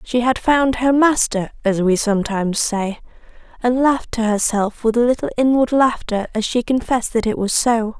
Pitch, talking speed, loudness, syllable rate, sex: 235 Hz, 190 wpm, -18 LUFS, 5.1 syllables/s, female